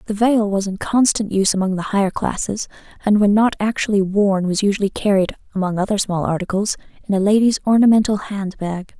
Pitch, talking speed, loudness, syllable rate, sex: 200 Hz, 185 wpm, -18 LUFS, 5.9 syllables/s, female